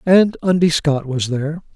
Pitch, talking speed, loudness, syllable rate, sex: 160 Hz, 170 wpm, -17 LUFS, 4.7 syllables/s, male